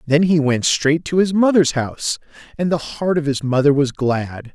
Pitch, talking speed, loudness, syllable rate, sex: 150 Hz, 210 wpm, -18 LUFS, 4.7 syllables/s, male